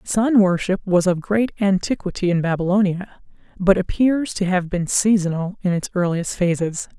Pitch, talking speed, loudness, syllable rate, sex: 190 Hz, 155 wpm, -20 LUFS, 4.8 syllables/s, female